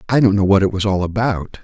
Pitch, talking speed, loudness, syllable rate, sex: 100 Hz, 295 wpm, -16 LUFS, 6.2 syllables/s, male